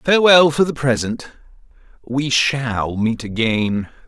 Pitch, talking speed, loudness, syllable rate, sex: 130 Hz, 120 wpm, -17 LUFS, 3.8 syllables/s, male